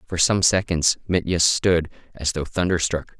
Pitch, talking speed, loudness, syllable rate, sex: 90 Hz, 150 wpm, -21 LUFS, 4.4 syllables/s, male